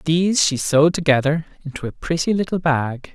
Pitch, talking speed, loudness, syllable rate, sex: 155 Hz, 170 wpm, -19 LUFS, 5.5 syllables/s, male